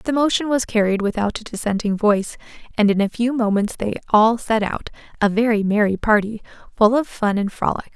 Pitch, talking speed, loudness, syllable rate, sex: 220 Hz, 195 wpm, -19 LUFS, 5.5 syllables/s, female